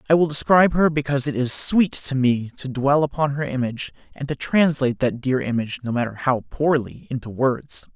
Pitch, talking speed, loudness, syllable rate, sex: 135 Hz, 205 wpm, -21 LUFS, 5.6 syllables/s, male